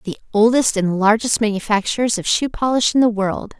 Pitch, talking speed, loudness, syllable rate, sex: 220 Hz, 185 wpm, -17 LUFS, 5.5 syllables/s, female